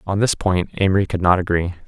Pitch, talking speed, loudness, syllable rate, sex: 90 Hz, 225 wpm, -19 LUFS, 6.1 syllables/s, male